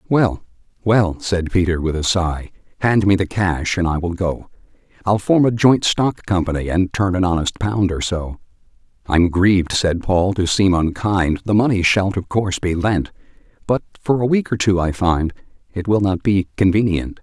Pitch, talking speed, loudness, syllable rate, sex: 95 Hz, 190 wpm, -18 LUFS, 4.7 syllables/s, male